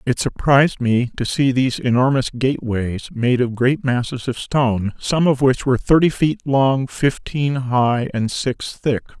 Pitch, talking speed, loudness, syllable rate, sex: 130 Hz, 175 wpm, -18 LUFS, 4.3 syllables/s, male